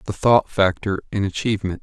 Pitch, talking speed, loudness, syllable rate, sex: 100 Hz, 165 wpm, -20 LUFS, 5.8 syllables/s, male